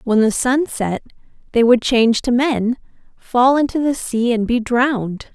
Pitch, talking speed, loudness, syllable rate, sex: 245 Hz, 180 wpm, -17 LUFS, 4.4 syllables/s, female